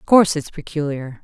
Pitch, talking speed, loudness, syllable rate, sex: 155 Hz, 195 wpm, -20 LUFS, 5.9 syllables/s, female